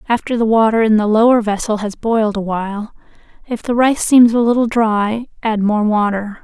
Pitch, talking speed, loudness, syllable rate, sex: 220 Hz, 195 wpm, -15 LUFS, 5.2 syllables/s, female